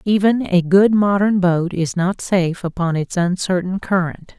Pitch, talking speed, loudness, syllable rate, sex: 185 Hz, 165 wpm, -17 LUFS, 4.5 syllables/s, female